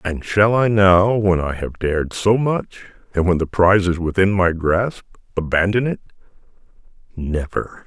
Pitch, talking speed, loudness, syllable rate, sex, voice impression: 95 Hz, 150 wpm, -18 LUFS, 4.6 syllables/s, male, masculine, slightly old, thick, tensed, powerful, hard, slightly muffled, calm, mature, wild, slightly lively, strict